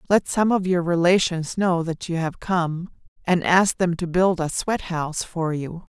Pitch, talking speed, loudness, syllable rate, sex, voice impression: 175 Hz, 200 wpm, -22 LUFS, 4.3 syllables/s, female, feminine, adult-like, tensed, slightly powerful, bright, clear, fluent, intellectual, calm, reassuring, elegant, lively, slightly sharp